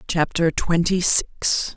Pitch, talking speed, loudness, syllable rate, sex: 165 Hz, 100 wpm, -19 LUFS, 3.1 syllables/s, female